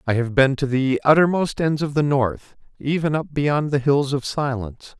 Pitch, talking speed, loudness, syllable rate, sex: 140 Hz, 205 wpm, -20 LUFS, 4.8 syllables/s, male